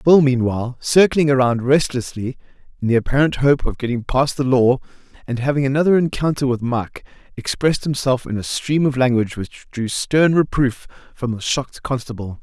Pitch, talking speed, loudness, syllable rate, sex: 130 Hz, 170 wpm, -19 LUFS, 5.3 syllables/s, male